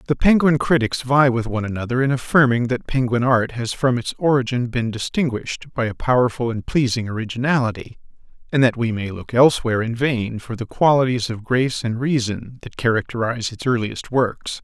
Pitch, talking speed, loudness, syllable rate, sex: 125 Hz, 180 wpm, -20 LUFS, 5.6 syllables/s, male